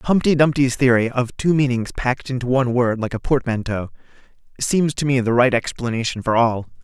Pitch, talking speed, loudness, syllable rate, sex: 125 Hz, 185 wpm, -19 LUFS, 5.6 syllables/s, male